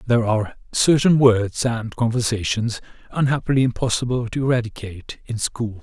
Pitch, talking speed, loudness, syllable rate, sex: 120 Hz, 125 wpm, -20 LUFS, 5.4 syllables/s, male